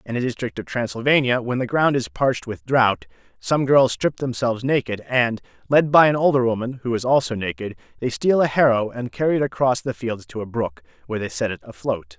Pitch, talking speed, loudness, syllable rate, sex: 120 Hz, 220 wpm, -21 LUFS, 5.7 syllables/s, male